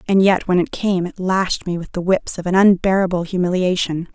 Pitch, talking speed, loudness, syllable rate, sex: 180 Hz, 215 wpm, -18 LUFS, 5.3 syllables/s, female